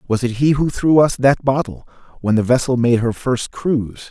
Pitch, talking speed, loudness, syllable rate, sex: 125 Hz, 220 wpm, -17 LUFS, 5.1 syllables/s, male